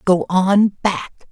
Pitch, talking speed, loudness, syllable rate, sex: 190 Hz, 135 wpm, -17 LUFS, 2.9 syllables/s, male